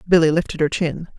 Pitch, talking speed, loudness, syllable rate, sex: 160 Hz, 205 wpm, -19 LUFS, 6.1 syllables/s, female